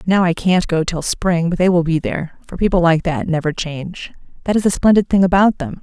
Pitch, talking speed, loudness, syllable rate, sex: 175 Hz, 245 wpm, -16 LUFS, 5.6 syllables/s, female